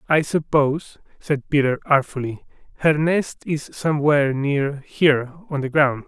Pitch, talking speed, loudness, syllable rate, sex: 145 Hz, 140 wpm, -21 LUFS, 4.7 syllables/s, male